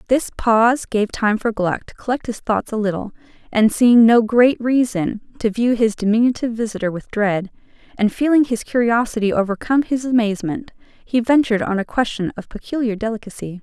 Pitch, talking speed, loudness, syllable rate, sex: 225 Hz, 170 wpm, -18 LUFS, 5.5 syllables/s, female